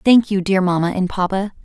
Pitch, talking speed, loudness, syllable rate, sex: 190 Hz, 220 wpm, -18 LUFS, 5.6 syllables/s, female